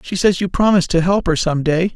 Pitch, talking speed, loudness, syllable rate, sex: 180 Hz, 275 wpm, -16 LUFS, 6.0 syllables/s, male